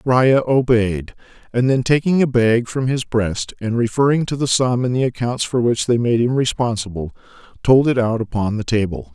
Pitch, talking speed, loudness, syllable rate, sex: 120 Hz, 195 wpm, -18 LUFS, 4.9 syllables/s, male